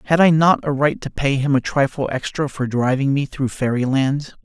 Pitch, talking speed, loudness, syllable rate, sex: 140 Hz, 230 wpm, -19 LUFS, 5.0 syllables/s, male